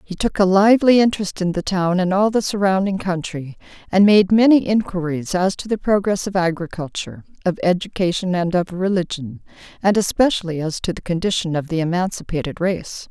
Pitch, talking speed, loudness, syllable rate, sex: 185 Hz, 175 wpm, -19 LUFS, 5.6 syllables/s, female